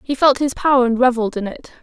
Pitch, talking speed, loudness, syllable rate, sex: 250 Hz, 265 wpm, -17 LUFS, 6.7 syllables/s, female